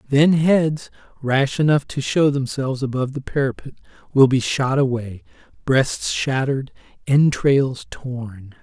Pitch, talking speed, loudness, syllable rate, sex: 135 Hz, 125 wpm, -19 LUFS, 4.2 syllables/s, male